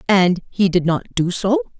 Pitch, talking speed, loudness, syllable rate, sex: 195 Hz, 200 wpm, -18 LUFS, 4.6 syllables/s, female